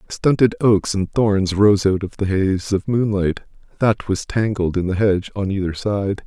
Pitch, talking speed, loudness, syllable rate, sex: 100 Hz, 190 wpm, -19 LUFS, 4.5 syllables/s, male